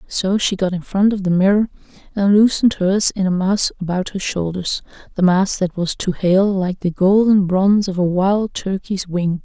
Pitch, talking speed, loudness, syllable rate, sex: 190 Hz, 195 wpm, -17 LUFS, 4.8 syllables/s, female